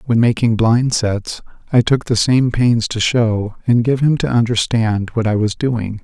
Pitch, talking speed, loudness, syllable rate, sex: 115 Hz, 200 wpm, -16 LUFS, 4.2 syllables/s, male